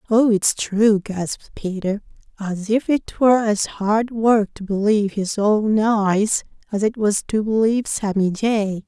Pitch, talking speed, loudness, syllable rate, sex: 210 Hz, 160 wpm, -19 LUFS, 4.1 syllables/s, female